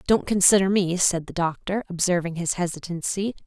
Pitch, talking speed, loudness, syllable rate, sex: 180 Hz, 155 wpm, -23 LUFS, 5.4 syllables/s, female